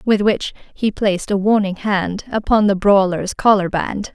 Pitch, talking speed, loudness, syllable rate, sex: 200 Hz, 160 wpm, -17 LUFS, 4.5 syllables/s, female